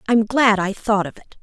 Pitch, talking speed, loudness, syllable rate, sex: 215 Hz, 255 wpm, -18 LUFS, 4.9 syllables/s, female